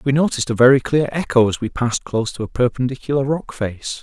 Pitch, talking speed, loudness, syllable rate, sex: 130 Hz, 225 wpm, -18 LUFS, 6.4 syllables/s, male